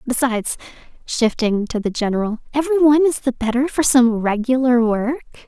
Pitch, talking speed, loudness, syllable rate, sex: 250 Hz, 140 wpm, -18 LUFS, 5.5 syllables/s, female